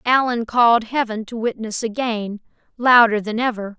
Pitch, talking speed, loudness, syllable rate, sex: 230 Hz, 145 wpm, -18 LUFS, 4.8 syllables/s, female